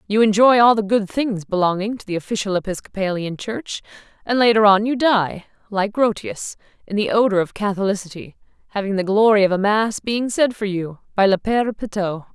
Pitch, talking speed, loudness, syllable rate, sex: 205 Hz, 185 wpm, -19 LUFS, 5.5 syllables/s, female